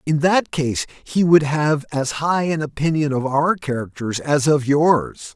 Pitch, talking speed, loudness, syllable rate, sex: 145 Hz, 180 wpm, -19 LUFS, 3.9 syllables/s, male